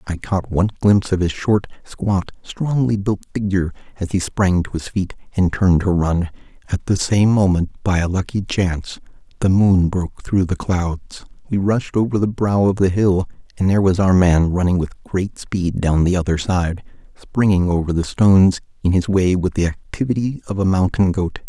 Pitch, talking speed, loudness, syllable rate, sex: 95 Hz, 195 wpm, -18 LUFS, 5.1 syllables/s, male